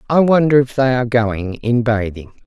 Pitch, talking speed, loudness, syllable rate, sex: 120 Hz, 195 wpm, -16 LUFS, 5.1 syllables/s, female